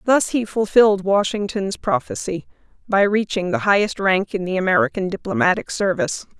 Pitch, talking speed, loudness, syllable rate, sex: 195 Hz, 140 wpm, -19 LUFS, 5.4 syllables/s, female